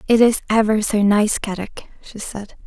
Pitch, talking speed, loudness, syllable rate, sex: 215 Hz, 180 wpm, -18 LUFS, 4.9 syllables/s, female